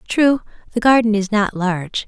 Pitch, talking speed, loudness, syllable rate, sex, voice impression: 215 Hz, 175 wpm, -17 LUFS, 5.1 syllables/s, female, feminine, adult-like, slightly relaxed, soft, fluent, slightly raspy, slightly intellectual, calm, elegant, kind, modest